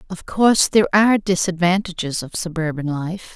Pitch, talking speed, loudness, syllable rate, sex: 185 Hz, 145 wpm, -18 LUFS, 5.5 syllables/s, female